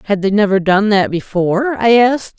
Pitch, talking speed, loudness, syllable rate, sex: 210 Hz, 200 wpm, -13 LUFS, 5.4 syllables/s, female